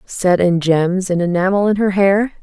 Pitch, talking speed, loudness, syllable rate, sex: 190 Hz, 200 wpm, -15 LUFS, 4.4 syllables/s, female